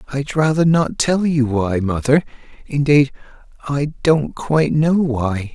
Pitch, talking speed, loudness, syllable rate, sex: 140 Hz, 140 wpm, -17 LUFS, 3.9 syllables/s, male